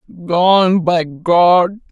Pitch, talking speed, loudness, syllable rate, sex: 175 Hz, 95 wpm, -13 LUFS, 2.4 syllables/s, male